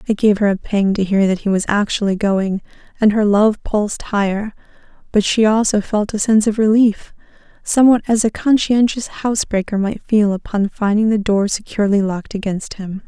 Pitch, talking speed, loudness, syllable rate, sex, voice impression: 210 Hz, 190 wpm, -16 LUFS, 5.3 syllables/s, female, very feminine, young, very thin, very relaxed, very weak, dark, very soft, slightly muffled, fluent, slightly raspy, very cute, very intellectual, slightly refreshing, very sincere, very calm, very friendly, very reassuring, very unique, very elegant, very sweet, very kind, very modest, slightly light